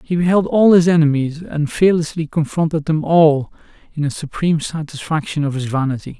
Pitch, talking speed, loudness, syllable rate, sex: 155 Hz, 165 wpm, -17 LUFS, 5.5 syllables/s, male